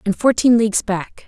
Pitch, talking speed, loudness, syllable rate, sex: 215 Hz, 190 wpm, -17 LUFS, 5.1 syllables/s, female